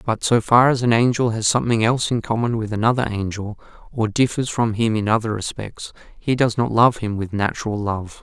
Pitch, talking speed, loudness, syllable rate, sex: 115 Hz, 210 wpm, -20 LUFS, 5.6 syllables/s, male